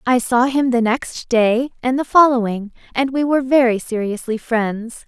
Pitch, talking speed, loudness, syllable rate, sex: 245 Hz, 175 wpm, -17 LUFS, 4.5 syllables/s, female